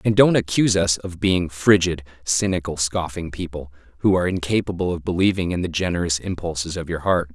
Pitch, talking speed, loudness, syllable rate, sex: 85 Hz, 180 wpm, -21 LUFS, 5.8 syllables/s, male